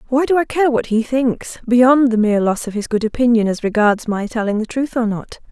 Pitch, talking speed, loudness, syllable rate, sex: 235 Hz, 250 wpm, -17 LUFS, 5.4 syllables/s, female